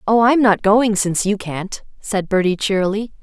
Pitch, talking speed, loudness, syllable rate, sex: 205 Hz, 185 wpm, -17 LUFS, 4.9 syllables/s, female